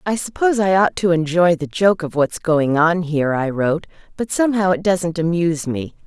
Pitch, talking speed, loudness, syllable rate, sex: 175 Hz, 210 wpm, -18 LUFS, 5.4 syllables/s, female